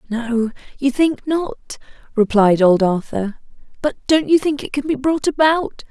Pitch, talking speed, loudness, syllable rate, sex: 260 Hz, 165 wpm, -18 LUFS, 4.2 syllables/s, female